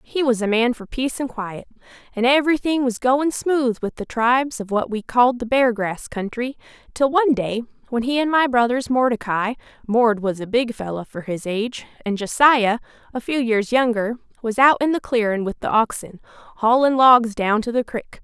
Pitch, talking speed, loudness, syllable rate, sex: 240 Hz, 190 wpm, -20 LUFS, 5.1 syllables/s, female